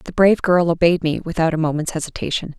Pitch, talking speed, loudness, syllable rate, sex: 165 Hz, 210 wpm, -18 LUFS, 6.3 syllables/s, female